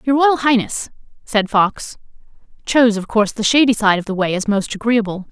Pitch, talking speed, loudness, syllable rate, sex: 225 Hz, 190 wpm, -16 LUFS, 5.5 syllables/s, female